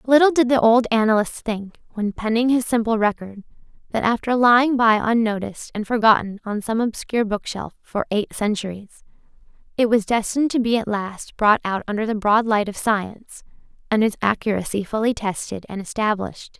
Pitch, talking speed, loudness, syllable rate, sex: 220 Hz, 170 wpm, -20 LUFS, 5.4 syllables/s, female